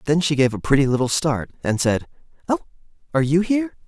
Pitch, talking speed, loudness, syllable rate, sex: 135 Hz, 200 wpm, -21 LUFS, 6.6 syllables/s, male